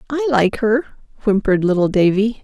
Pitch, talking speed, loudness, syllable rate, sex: 205 Hz, 150 wpm, -17 LUFS, 5.6 syllables/s, female